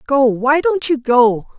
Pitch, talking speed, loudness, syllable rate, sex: 255 Hz, 150 wpm, -15 LUFS, 3.8 syllables/s, female